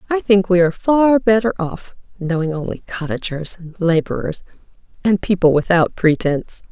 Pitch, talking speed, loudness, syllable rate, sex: 185 Hz, 145 wpm, -17 LUFS, 5.1 syllables/s, female